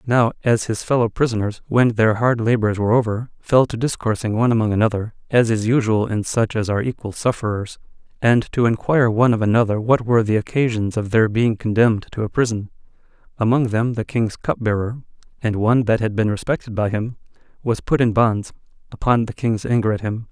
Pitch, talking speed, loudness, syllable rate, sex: 115 Hz, 195 wpm, -19 LUFS, 5.9 syllables/s, male